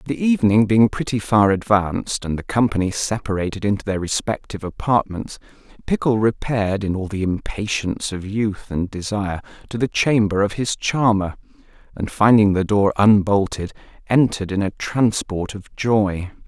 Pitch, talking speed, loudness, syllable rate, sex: 105 Hz, 150 wpm, -20 LUFS, 5.1 syllables/s, male